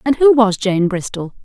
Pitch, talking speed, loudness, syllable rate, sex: 220 Hz, 210 wpm, -14 LUFS, 4.7 syllables/s, female